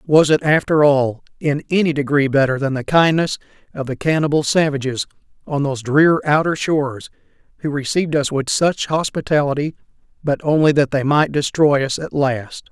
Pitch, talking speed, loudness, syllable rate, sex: 145 Hz, 165 wpm, -17 LUFS, 5.2 syllables/s, male